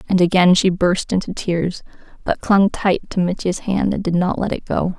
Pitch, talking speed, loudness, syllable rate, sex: 185 Hz, 215 wpm, -18 LUFS, 4.8 syllables/s, female